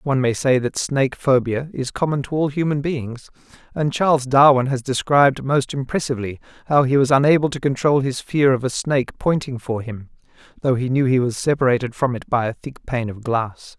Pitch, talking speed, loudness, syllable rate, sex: 130 Hz, 200 wpm, -19 LUFS, 5.5 syllables/s, male